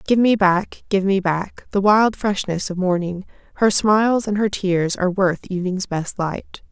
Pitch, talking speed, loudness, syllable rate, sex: 195 Hz, 180 wpm, -19 LUFS, 4.5 syllables/s, female